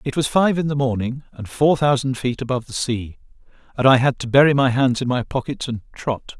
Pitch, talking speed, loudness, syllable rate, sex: 130 Hz, 235 wpm, -19 LUFS, 5.7 syllables/s, male